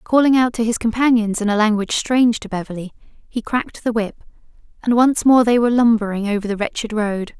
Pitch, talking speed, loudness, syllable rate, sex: 225 Hz, 205 wpm, -18 LUFS, 5.9 syllables/s, female